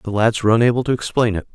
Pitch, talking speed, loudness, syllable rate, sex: 115 Hz, 270 wpm, -17 LUFS, 7.8 syllables/s, male